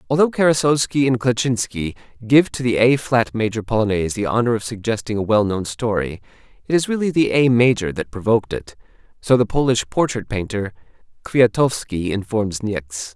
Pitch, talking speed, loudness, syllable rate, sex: 115 Hz, 155 wpm, -19 LUFS, 5.4 syllables/s, male